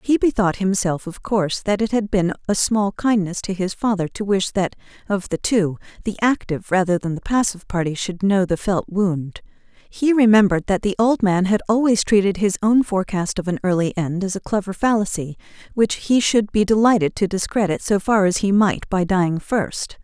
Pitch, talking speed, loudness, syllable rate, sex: 195 Hz, 205 wpm, -19 LUFS, 5.2 syllables/s, female